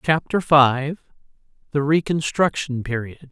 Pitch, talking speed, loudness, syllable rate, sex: 145 Hz, 90 wpm, -20 LUFS, 4.1 syllables/s, male